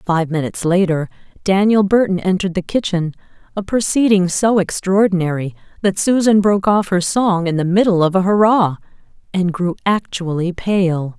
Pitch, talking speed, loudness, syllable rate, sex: 185 Hz, 145 wpm, -16 LUFS, 5.1 syllables/s, female